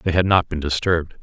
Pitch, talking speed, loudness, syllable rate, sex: 85 Hz, 245 wpm, -20 LUFS, 6.1 syllables/s, male